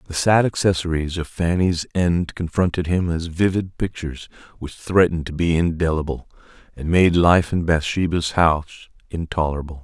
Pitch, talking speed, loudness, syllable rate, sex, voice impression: 85 Hz, 140 wpm, -20 LUFS, 5.3 syllables/s, male, very masculine, very middle-aged, very thick, tensed, powerful, dark, very soft, muffled, slightly fluent, raspy, very cool, intellectual, slightly refreshing, sincere, very calm, very mature, friendly, slightly reassuring, unique, slightly elegant, wild, sweet, lively, kind, modest